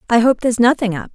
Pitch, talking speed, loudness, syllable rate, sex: 230 Hz, 265 wpm, -15 LUFS, 7.5 syllables/s, female